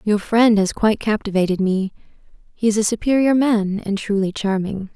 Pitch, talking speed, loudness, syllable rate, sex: 210 Hz, 170 wpm, -19 LUFS, 5.3 syllables/s, female